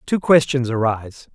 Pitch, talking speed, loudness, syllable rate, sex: 130 Hz, 135 wpm, -18 LUFS, 5.0 syllables/s, male